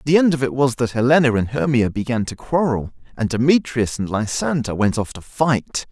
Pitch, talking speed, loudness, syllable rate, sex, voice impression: 125 Hz, 205 wpm, -19 LUFS, 5.2 syllables/s, male, masculine, adult-like, sincere, friendly, slightly unique, slightly sweet